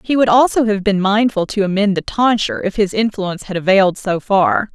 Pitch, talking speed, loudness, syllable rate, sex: 200 Hz, 215 wpm, -15 LUFS, 5.6 syllables/s, female